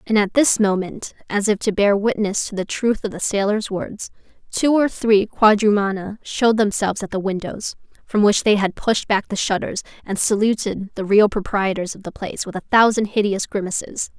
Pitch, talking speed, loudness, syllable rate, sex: 205 Hz, 195 wpm, -19 LUFS, 5.1 syllables/s, female